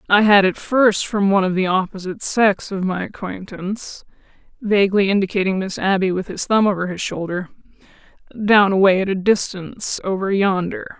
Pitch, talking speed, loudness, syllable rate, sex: 195 Hz, 165 wpm, -18 LUFS, 5.4 syllables/s, female